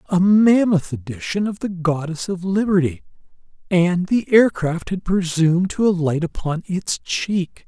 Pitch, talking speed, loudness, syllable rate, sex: 180 Hz, 140 wpm, -19 LUFS, 4.2 syllables/s, male